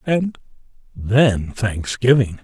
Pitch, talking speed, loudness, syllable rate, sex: 115 Hz, 75 wpm, -18 LUFS, 2.8 syllables/s, male